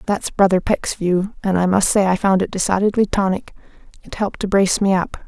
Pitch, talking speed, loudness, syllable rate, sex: 190 Hz, 215 wpm, -18 LUFS, 5.7 syllables/s, female